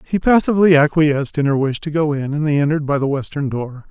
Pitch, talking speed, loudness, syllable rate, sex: 150 Hz, 245 wpm, -17 LUFS, 6.4 syllables/s, male